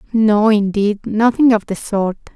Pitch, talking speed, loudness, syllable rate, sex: 215 Hz, 155 wpm, -15 LUFS, 4.3 syllables/s, female